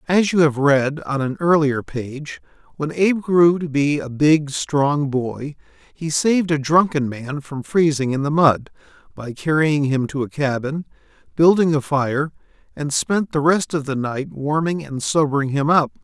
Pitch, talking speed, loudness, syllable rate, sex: 150 Hz, 180 wpm, -19 LUFS, 4.3 syllables/s, male